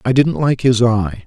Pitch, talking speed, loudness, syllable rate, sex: 120 Hz, 235 wpm, -15 LUFS, 4.3 syllables/s, male